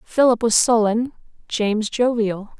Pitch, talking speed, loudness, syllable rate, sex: 225 Hz, 115 wpm, -19 LUFS, 4.3 syllables/s, female